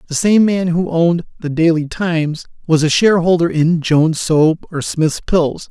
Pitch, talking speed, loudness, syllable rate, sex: 165 Hz, 180 wpm, -15 LUFS, 4.8 syllables/s, male